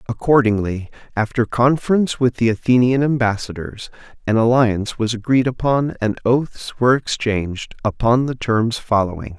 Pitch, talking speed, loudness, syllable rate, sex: 115 Hz, 130 wpm, -18 LUFS, 5.0 syllables/s, male